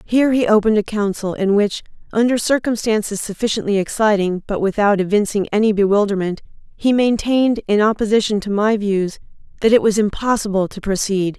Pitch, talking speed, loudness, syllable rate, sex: 210 Hz, 155 wpm, -17 LUFS, 5.7 syllables/s, female